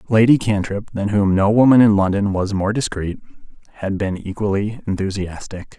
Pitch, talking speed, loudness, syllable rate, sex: 100 Hz, 155 wpm, -18 LUFS, 5.1 syllables/s, male